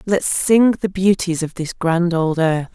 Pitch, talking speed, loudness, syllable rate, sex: 180 Hz, 195 wpm, -17 LUFS, 3.9 syllables/s, female